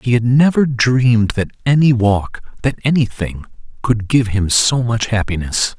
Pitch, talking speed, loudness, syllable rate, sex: 120 Hz, 135 wpm, -15 LUFS, 4.4 syllables/s, male